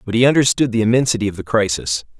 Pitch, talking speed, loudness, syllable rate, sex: 110 Hz, 220 wpm, -17 LUFS, 7.1 syllables/s, male